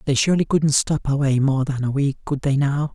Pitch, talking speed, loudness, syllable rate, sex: 140 Hz, 245 wpm, -20 LUFS, 5.6 syllables/s, male